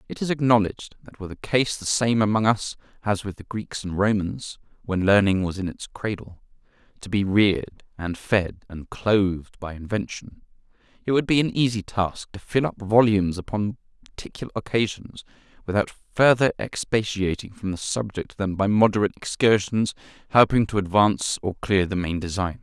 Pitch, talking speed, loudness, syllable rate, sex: 105 Hz, 165 wpm, -23 LUFS, 5.2 syllables/s, male